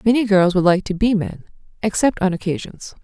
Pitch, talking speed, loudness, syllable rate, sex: 195 Hz, 180 wpm, -18 LUFS, 5.6 syllables/s, female